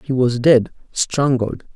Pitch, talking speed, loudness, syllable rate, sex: 130 Hz, 105 wpm, -18 LUFS, 3.7 syllables/s, male